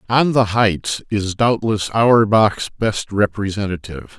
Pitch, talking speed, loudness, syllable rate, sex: 105 Hz, 115 wpm, -17 LUFS, 4.2 syllables/s, male